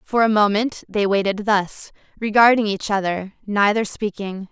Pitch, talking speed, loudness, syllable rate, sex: 205 Hz, 145 wpm, -19 LUFS, 4.5 syllables/s, female